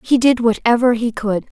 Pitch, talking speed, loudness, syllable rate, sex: 235 Hz, 190 wpm, -16 LUFS, 4.9 syllables/s, female